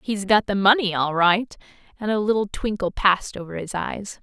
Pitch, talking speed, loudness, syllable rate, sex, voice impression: 200 Hz, 200 wpm, -21 LUFS, 5.2 syllables/s, female, feminine, adult-like, bright, clear, fluent, calm, friendly, reassuring, unique, lively, kind, slightly modest